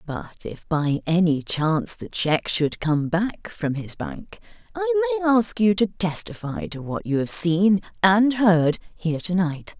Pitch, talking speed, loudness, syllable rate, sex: 190 Hz, 170 wpm, -22 LUFS, 4.1 syllables/s, female